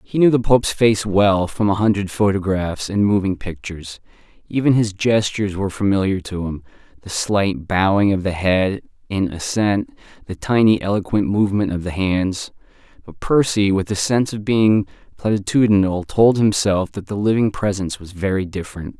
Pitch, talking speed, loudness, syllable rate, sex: 100 Hz, 165 wpm, -19 LUFS, 5.1 syllables/s, male